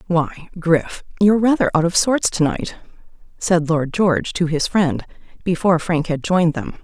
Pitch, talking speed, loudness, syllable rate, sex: 170 Hz, 175 wpm, -18 LUFS, 4.8 syllables/s, female